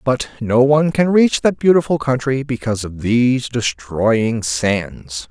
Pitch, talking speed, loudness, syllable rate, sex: 125 Hz, 145 wpm, -17 LUFS, 4.1 syllables/s, male